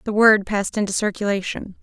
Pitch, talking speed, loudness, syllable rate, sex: 205 Hz, 165 wpm, -20 LUFS, 6.0 syllables/s, female